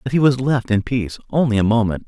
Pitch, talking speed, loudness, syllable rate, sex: 120 Hz, 260 wpm, -18 LUFS, 6.3 syllables/s, male